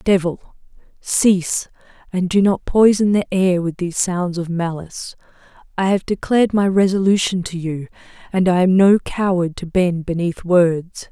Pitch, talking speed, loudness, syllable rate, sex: 185 Hz, 155 wpm, -18 LUFS, 4.6 syllables/s, female